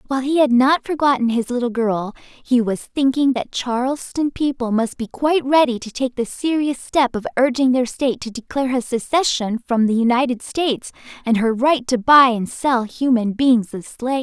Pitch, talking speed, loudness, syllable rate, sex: 250 Hz, 195 wpm, -19 LUFS, 5.0 syllables/s, female